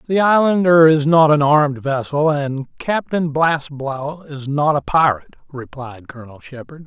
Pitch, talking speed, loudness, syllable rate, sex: 145 Hz, 150 wpm, -16 LUFS, 4.5 syllables/s, male